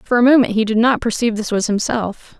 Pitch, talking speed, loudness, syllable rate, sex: 225 Hz, 250 wpm, -16 LUFS, 6.0 syllables/s, female